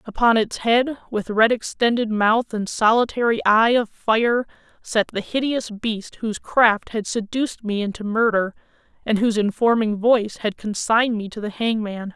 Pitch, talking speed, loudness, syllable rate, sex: 220 Hz, 165 wpm, -20 LUFS, 4.7 syllables/s, female